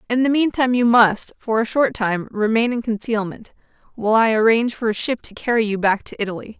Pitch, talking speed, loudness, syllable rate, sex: 225 Hz, 220 wpm, -19 LUFS, 5.9 syllables/s, female